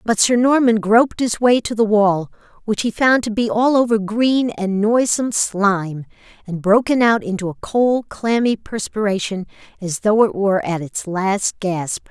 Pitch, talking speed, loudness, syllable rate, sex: 210 Hz, 180 wpm, -17 LUFS, 4.5 syllables/s, female